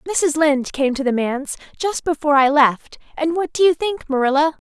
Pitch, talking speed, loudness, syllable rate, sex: 295 Hz, 205 wpm, -18 LUFS, 5.5 syllables/s, female